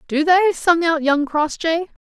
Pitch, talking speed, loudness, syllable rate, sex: 320 Hz, 175 wpm, -17 LUFS, 4.3 syllables/s, female